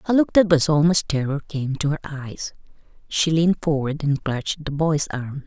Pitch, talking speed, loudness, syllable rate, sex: 150 Hz, 200 wpm, -21 LUFS, 5.1 syllables/s, female